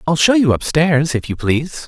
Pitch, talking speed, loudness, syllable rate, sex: 155 Hz, 255 wpm, -15 LUFS, 5.2 syllables/s, male